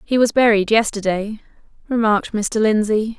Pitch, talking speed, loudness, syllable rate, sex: 215 Hz, 130 wpm, -17 LUFS, 5.0 syllables/s, female